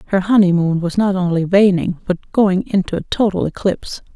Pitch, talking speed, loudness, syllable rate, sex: 185 Hz, 175 wpm, -16 LUFS, 5.3 syllables/s, female